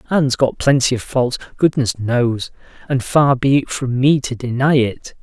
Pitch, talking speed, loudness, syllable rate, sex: 130 Hz, 185 wpm, -17 LUFS, 4.5 syllables/s, male